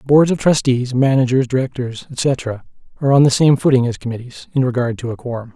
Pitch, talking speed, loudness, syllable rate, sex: 130 Hz, 195 wpm, -17 LUFS, 5.7 syllables/s, male